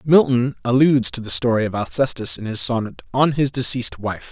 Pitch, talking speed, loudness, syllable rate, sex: 125 Hz, 195 wpm, -19 LUFS, 5.7 syllables/s, male